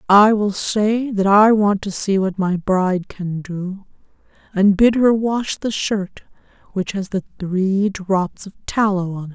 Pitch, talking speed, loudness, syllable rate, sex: 195 Hz, 180 wpm, -18 LUFS, 3.8 syllables/s, female